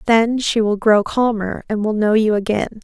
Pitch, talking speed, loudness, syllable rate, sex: 215 Hz, 210 wpm, -17 LUFS, 4.6 syllables/s, female